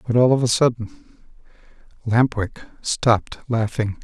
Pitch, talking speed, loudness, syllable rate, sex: 115 Hz, 135 wpm, -20 LUFS, 4.6 syllables/s, male